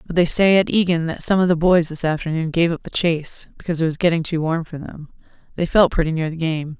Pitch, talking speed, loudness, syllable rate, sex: 165 Hz, 265 wpm, -19 LUFS, 6.2 syllables/s, female